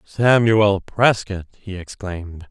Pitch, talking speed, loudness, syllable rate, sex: 100 Hz, 95 wpm, -18 LUFS, 3.5 syllables/s, male